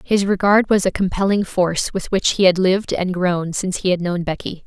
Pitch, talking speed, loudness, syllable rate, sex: 185 Hz, 230 wpm, -18 LUFS, 5.5 syllables/s, female